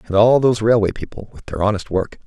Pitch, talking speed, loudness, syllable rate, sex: 105 Hz, 240 wpm, -17 LUFS, 6.4 syllables/s, male